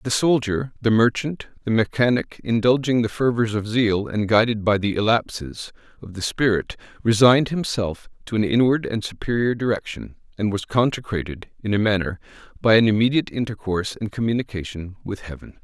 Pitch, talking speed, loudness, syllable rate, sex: 110 Hz, 155 wpm, -21 LUFS, 5.5 syllables/s, male